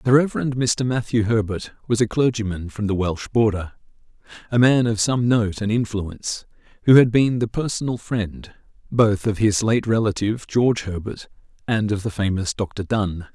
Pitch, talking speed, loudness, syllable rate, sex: 110 Hz, 170 wpm, -21 LUFS, 5.0 syllables/s, male